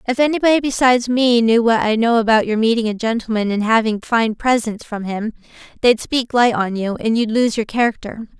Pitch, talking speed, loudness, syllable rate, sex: 230 Hz, 205 wpm, -17 LUFS, 5.5 syllables/s, female